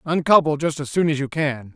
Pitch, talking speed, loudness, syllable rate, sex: 150 Hz, 240 wpm, -20 LUFS, 5.5 syllables/s, male